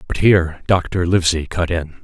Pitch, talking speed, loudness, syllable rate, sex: 85 Hz, 175 wpm, -17 LUFS, 4.9 syllables/s, male